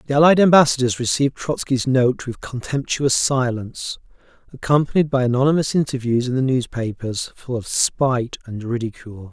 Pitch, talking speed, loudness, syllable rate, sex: 130 Hz, 135 wpm, -19 LUFS, 5.4 syllables/s, male